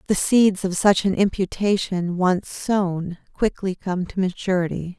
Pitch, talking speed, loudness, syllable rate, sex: 190 Hz, 145 wpm, -21 LUFS, 4.1 syllables/s, female